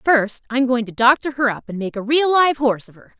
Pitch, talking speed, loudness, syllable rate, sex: 250 Hz, 300 wpm, -18 LUFS, 6.0 syllables/s, female